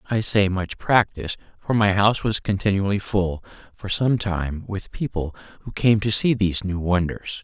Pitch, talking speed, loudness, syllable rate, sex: 100 Hz, 180 wpm, -22 LUFS, 4.9 syllables/s, male